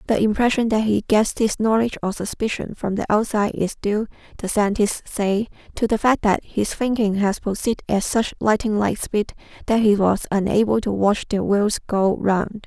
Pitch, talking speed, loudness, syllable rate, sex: 210 Hz, 190 wpm, -21 LUFS, 5.1 syllables/s, female